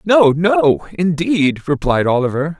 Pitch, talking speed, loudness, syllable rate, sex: 160 Hz, 115 wpm, -15 LUFS, 3.8 syllables/s, male